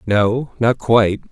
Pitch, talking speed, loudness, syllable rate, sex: 115 Hz, 135 wpm, -16 LUFS, 3.8 syllables/s, male